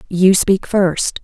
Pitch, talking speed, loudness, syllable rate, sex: 190 Hz, 145 wpm, -14 LUFS, 2.9 syllables/s, female